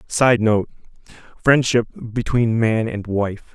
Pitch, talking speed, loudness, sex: 115 Hz, 100 wpm, -19 LUFS, male